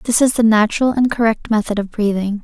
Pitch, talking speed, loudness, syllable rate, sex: 220 Hz, 220 wpm, -16 LUFS, 6.1 syllables/s, female